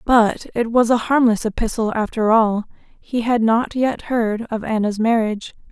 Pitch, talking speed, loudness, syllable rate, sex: 225 Hz, 170 wpm, -19 LUFS, 4.4 syllables/s, female